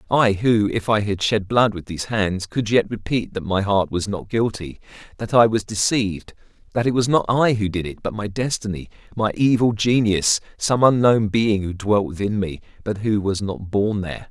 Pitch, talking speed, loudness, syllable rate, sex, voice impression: 105 Hz, 210 wpm, -20 LUFS, 4.9 syllables/s, male, very masculine, very adult-like, middle-aged, very thick, tensed, powerful, bright, hard, clear, fluent, slightly raspy, slightly cool, intellectual, slightly refreshing, sincere, very calm, slightly mature, slightly friendly, slightly reassuring, very unique, slightly elegant, wild, kind, modest